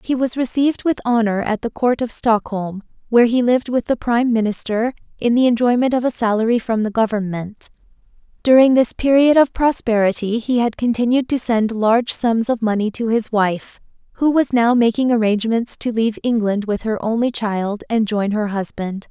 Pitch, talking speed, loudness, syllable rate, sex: 230 Hz, 185 wpm, -18 LUFS, 5.3 syllables/s, female